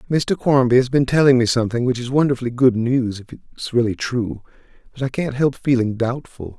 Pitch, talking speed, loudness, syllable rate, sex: 125 Hz, 200 wpm, -19 LUFS, 5.7 syllables/s, male